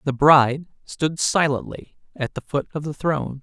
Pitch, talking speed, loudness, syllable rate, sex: 145 Hz, 175 wpm, -21 LUFS, 4.8 syllables/s, male